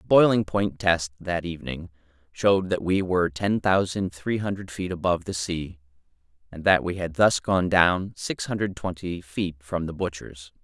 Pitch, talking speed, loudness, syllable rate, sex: 90 Hz, 180 wpm, -25 LUFS, 4.7 syllables/s, male